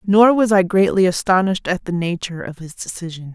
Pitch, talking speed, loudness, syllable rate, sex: 185 Hz, 195 wpm, -17 LUFS, 5.9 syllables/s, female